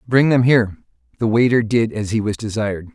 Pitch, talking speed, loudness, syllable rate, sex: 115 Hz, 205 wpm, -18 LUFS, 6.0 syllables/s, male